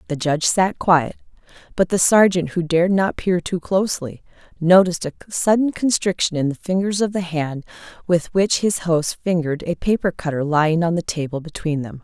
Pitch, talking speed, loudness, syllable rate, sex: 170 Hz, 185 wpm, -19 LUFS, 5.3 syllables/s, female